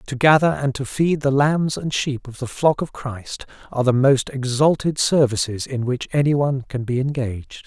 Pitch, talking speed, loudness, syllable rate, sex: 135 Hz, 205 wpm, -20 LUFS, 5.0 syllables/s, male